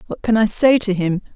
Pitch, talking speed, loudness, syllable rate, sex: 210 Hz, 265 wpm, -16 LUFS, 5.5 syllables/s, female